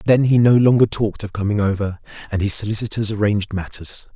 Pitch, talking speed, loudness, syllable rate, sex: 105 Hz, 190 wpm, -18 LUFS, 6.3 syllables/s, male